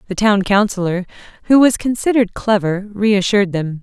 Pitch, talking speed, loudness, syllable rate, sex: 205 Hz, 140 wpm, -16 LUFS, 5.3 syllables/s, female